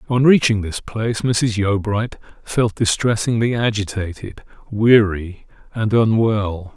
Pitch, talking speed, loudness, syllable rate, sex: 110 Hz, 105 wpm, -18 LUFS, 4.0 syllables/s, male